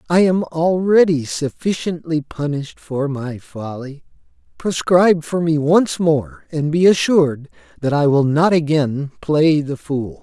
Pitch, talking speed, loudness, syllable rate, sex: 155 Hz, 140 wpm, -17 LUFS, 4.1 syllables/s, male